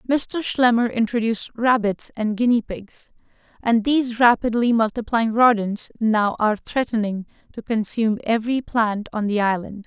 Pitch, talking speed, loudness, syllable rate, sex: 225 Hz, 135 wpm, -20 LUFS, 4.8 syllables/s, female